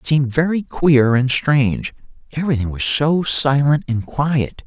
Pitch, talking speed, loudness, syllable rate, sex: 140 Hz, 155 wpm, -17 LUFS, 4.5 syllables/s, male